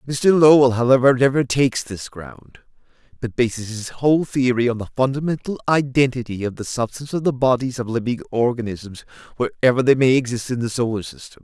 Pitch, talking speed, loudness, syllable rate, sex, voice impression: 125 Hz, 175 wpm, -19 LUFS, 5.8 syllables/s, male, very masculine, very middle-aged, very thick, tensed, powerful, bright, slightly hard, clear, fluent, cool, intellectual, refreshing, very sincere, calm, mature, friendly, very reassuring, slightly unique, slightly elegant, wild, sweet, lively, slightly strict, slightly intense